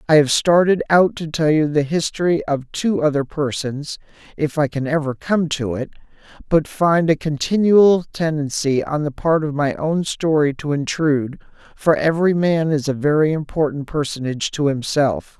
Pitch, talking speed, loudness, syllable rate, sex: 150 Hz, 165 wpm, -19 LUFS, 4.8 syllables/s, male